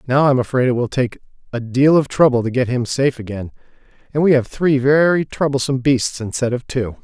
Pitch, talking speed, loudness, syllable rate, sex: 130 Hz, 215 wpm, -17 LUFS, 5.8 syllables/s, male